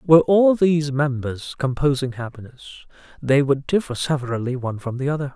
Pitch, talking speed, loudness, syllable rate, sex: 140 Hz, 155 wpm, -20 LUFS, 5.7 syllables/s, male